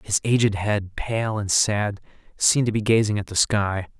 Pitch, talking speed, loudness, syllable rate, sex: 105 Hz, 195 wpm, -22 LUFS, 4.8 syllables/s, male